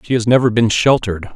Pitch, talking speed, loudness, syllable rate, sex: 115 Hz, 220 wpm, -14 LUFS, 6.6 syllables/s, male